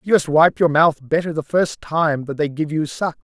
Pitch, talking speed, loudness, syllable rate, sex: 155 Hz, 245 wpm, -19 LUFS, 4.8 syllables/s, male